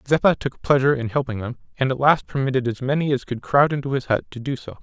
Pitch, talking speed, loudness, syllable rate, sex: 130 Hz, 260 wpm, -21 LUFS, 6.5 syllables/s, male